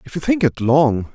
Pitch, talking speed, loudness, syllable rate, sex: 135 Hz, 265 wpm, -17 LUFS, 4.8 syllables/s, male